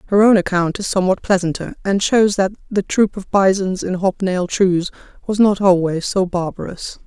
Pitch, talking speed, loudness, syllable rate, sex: 190 Hz, 185 wpm, -17 LUFS, 5.3 syllables/s, female